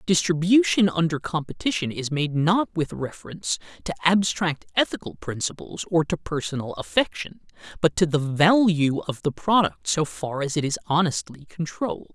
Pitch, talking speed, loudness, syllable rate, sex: 165 Hz, 150 wpm, -23 LUFS, 5.1 syllables/s, male